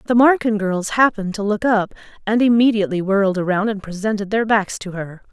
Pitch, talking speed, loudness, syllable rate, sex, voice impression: 210 Hz, 190 wpm, -18 LUFS, 5.9 syllables/s, female, feminine, adult-like, slightly fluent, slightly sweet